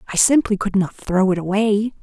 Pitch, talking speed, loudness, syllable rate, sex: 205 Hz, 205 wpm, -18 LUFS, 5.3 syllables/s, female